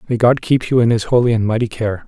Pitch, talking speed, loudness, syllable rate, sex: 115 Hz, 290 wpm, -16 LUFS, 6.4 syllables/s, male